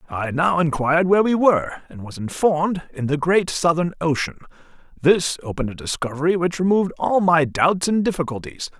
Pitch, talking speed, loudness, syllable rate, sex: 165 Hz, 170 wpm, -20 LUFS, 5.7 syllables/s, male